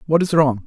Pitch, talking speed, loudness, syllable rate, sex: 145 Hz, 270 wpm, -17 LUFS, 5.7 syllables/s, male